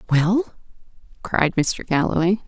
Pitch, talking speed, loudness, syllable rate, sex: 175 Hz, 95 wpm, -21 LUFS, 3.9 syllables/s, female